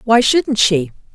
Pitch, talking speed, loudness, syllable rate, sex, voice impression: 210 Hz, 155 wpm, -14 LUFS, 3.6 syllables/s, female, feminine, adult-like, intellectual, slightly elegant